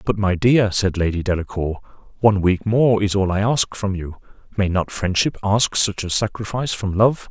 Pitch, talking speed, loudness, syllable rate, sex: 100 Hz, 190 wpm, -19 LUFS, 5.0 syllables/s, male